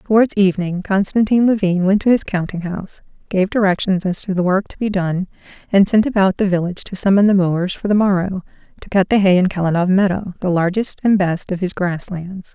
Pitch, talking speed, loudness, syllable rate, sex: 190 Hz, 215 wpm, -17 LUFS, 5.8 syllables/s, female